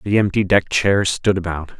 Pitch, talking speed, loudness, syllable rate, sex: 95 Hz, 200 wpm, -18 LUFS, 5.0 syllables/s, male